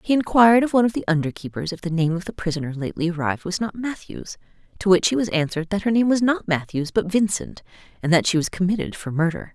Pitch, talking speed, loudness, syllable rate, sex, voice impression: 185 Hz, 240 wpm, -21 LUFS, 6.7 syllables/s, female, feminine, middle-aged, tensed, powerful, slightly hard, fluent, nasal, intellectual, calm, elegant, lively, slightly sharp